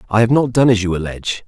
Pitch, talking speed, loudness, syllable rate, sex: 110 Hz, 285 wpm, -16 LUFS, 7.2 syllables/s, male